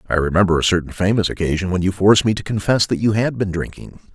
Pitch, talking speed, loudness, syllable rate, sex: 95 Hz, 245 wpm, -18 LUFS, 6.8 syllables/s, male